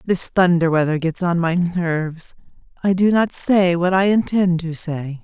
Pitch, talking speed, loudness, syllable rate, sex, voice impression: 175 Hz, 185 wpm, -18 LUFS, 4.4 syllables/s, female, feminine, middle-aged, tensed, powerful, slightly soft, clear, fluent, slightly raspy, intellectual, calm, friendly, elegant, lively, slightly sharp